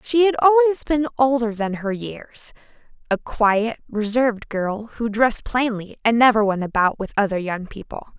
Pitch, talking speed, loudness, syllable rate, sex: 230 Hz, 160 wpm, -20 LUFS, 4.6 syllables/s, female